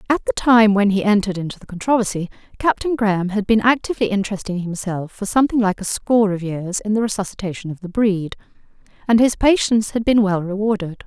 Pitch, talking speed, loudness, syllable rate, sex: 205 Hz, 195 wpm, -19 LUFS, 6.4 syllables/s, female